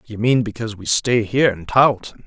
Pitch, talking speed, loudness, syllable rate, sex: 115 Hz, 210 wpm, -18 LUFS, 6.1 syllables/s, male